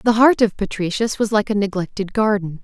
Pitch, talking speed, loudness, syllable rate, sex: 205 Hz, 205 wpm, -19 LUFS, 5.6 syllables/s, female